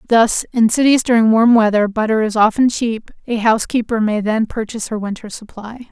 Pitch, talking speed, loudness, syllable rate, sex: 225 Hz, 195 wpm, -15 LUFS, 5.4 syllables/s, female